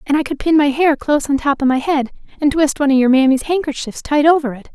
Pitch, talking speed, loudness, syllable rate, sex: 285 Hz, 280 wpm, -15 LUFS, 6.5 syllables/s, female